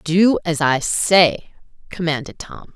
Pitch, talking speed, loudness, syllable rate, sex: 165 Hz, 130 wpm, -17 LUFS, 3.5 syllables/s, female